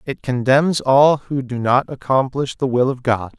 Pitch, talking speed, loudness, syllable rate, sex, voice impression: 130 Hz, 195 wpm, -17 LUFS, 4.3 syllables/s, male, very masculine, very adult-like, middle-aged, very thick, tensed, powerful, bright, slightly soft, clear, slightly fluent, cool, very intellectual, slightly refreshing, sincere, very calm, slightly mature, friendly, reassuring, elegant, slightly sweet, slightly lively, kind, slightly modest